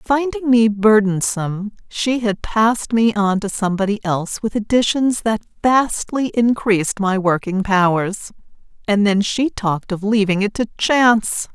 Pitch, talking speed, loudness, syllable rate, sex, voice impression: 215 Hz, 145 wpm, -17 LUFS, 4.5 syllables/s, female, feminine, adult-like, tensed, powerful, slightly bright, clear, intellectual, calm, friendly, reassuring, slightly elegant, lively, kind